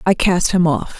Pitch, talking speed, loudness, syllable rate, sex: 175 Hz, 240 wpm, -16 LUFS, 4.7 syllables/s, female